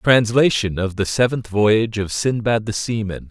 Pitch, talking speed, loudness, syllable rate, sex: 110 Hz, 180 wpm, -19 LUFS, 4.9 syllables/s, male